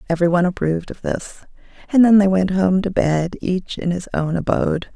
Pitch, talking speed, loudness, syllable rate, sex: 180 Hz, 205 wpm, -18 LUFS, 5.9 syllables/s, female